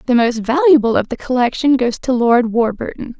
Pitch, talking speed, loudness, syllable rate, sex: 245 Hz, 190 wpm, -15 LUFS, 5.3 syllables/s, female